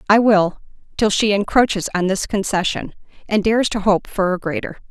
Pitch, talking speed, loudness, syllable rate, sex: 200 Hz, 185 wpm, -18 LUFS, 5.5 syllables/s, female